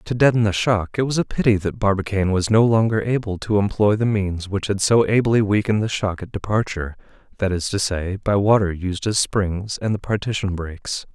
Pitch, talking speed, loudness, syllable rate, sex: 100 Hz, 215 wpm, -20 LUFS, 5.5 syllables/s, male